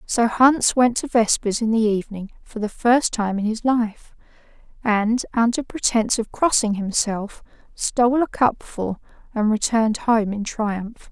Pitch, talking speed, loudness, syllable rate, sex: 225 Hz, 155 wpm, -20 LUFS, 4.3 syllables/s, female